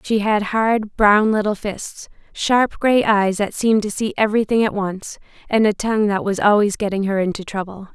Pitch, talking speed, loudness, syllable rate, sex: 210 Hz, 195 wpm, -18 LUFS, 5.0 syllables/s, female